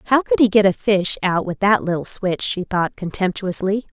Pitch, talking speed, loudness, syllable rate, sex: 195 Hz, 210 wpm, -19 LUFS, 5.0 syllables/s, female